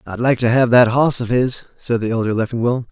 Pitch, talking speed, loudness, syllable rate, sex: 120 Hz, 245 wpm, -17 LUFS, 5.6 syllables/s, male